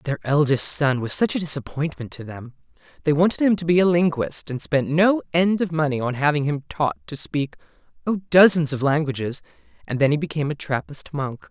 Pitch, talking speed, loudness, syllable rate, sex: 145 Hz, 195 wpm, -21 LUFS, 5.4 syllables/s, male